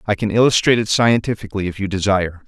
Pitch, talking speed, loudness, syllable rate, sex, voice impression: 100 Hz, 195 wpm, -17 LUFS, 7.3 syllables/s, male, very masculine, very middle-aged, very thick, very tensed, powerful, slightly dark, soft, very muffled, very fluent, slightly raspy, very cool, very intellectual, refreshing, sincere, very calm, mature, very friendly, very reassuring, very unique, elegant, very wild, sweet, lively, kind, slightly intense